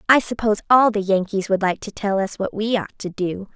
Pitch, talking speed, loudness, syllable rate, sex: 205 Hz, 255 wpm, -20 LUFS, 5.6 syllables/s, female